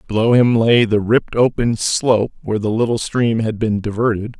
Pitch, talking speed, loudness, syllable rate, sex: 110 Hz, 190 wpm, -16 LUFS, 5.4 syllables/s, male